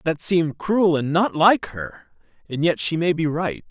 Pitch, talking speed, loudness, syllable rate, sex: 155 Hz, 210 wpm, -20 LUFS, 4.4 syllables/s, male